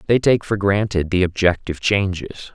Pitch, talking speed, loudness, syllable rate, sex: 100 Hz, 165 wpm, -19 LUFS, 5.1 syllables/s, male